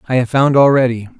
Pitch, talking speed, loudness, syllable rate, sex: 125 Hz, 200 wpm, -13 LUFS, 6.5 syllables/s, male